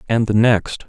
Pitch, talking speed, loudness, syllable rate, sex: 110 Hz, 205 wpm, -16 LUFS, 4.4 syllables/s, male